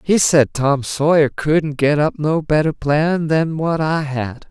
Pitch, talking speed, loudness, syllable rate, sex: 150 Hz, 185 wpm, -17 LUFS, 3.7 syllables/s, male